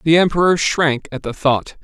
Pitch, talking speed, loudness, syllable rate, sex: 150 Hz, 195 wpm, -16 LUFS, 4.9 syllables/s, male